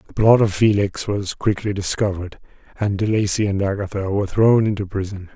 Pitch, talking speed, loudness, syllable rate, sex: 100 Hz, 180 wpm, -20 LUFS, 5.7 syllables/s, male